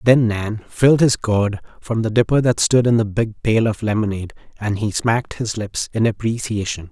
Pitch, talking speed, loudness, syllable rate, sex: 110 Hz, 200 wpm, -19 LUFS, 5.2 syllables/s, male